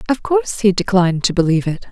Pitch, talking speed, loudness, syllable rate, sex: 195 Hz, 220 wpm, -16 LUFS, 7.1 syllables/s, female